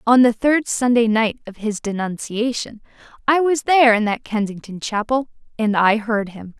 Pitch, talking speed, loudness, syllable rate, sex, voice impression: 230 Hz, 175 wpm, -19 LUFS, 4.8 syllables/s, female, very feminine, young, slightly adult-like, very thin, slightly tensed, slightly weak, very bright, slightly soft, very clear, very fluent, very cute, intellectual, very refreshing, sincere, very calm, very friendly, very reassuring, very unique, elegant, sweet, lively, slightly kind, slightly intense, slightly sharp, light